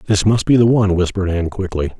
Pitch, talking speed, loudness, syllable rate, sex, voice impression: 95 Hz, 240 wpm, -16 LUFS, 7.4 syllables/s, male, very masculine, very adult-like, middle-aged, very thick, slightly tensed, very powerful, slightly dark, hard, very muffled, fluent, very cool, intellectual, sincere, calm, very mature, friendly, reassuring, very wild, slightly sweet, strict, slightly modest